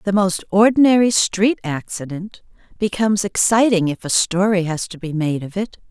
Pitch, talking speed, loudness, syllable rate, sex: 195 Hz, 160 wpm, -18 LUFS, 4.9 syllables/s, female